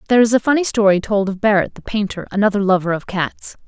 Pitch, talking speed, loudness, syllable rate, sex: 205 Hz, 230 wpm, -17 LUFS, 6.6 syllables/s, female